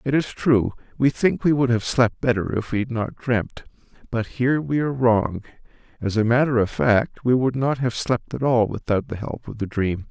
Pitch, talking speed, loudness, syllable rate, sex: 120 Hz, 225 wpm, -22 LUFS, 5.0 syllables/s, male